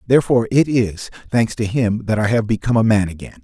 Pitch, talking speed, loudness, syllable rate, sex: 115 Hz, 225 wpm, -18 LUFS, 6.3 syllables/s, male